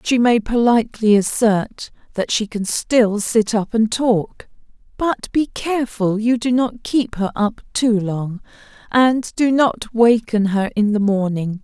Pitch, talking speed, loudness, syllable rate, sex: 225 Hz, 160 wpm, -18 LUFS, 3.9 syllables/s, female